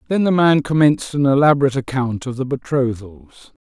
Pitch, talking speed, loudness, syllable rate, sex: 135 Hz, 165 wpm, -17 LUFS, 5.7 syllables/s, male